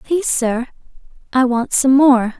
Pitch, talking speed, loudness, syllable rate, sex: 255 Hz, 150 wpm, -15 LUFS, 4.4 syllables/s, female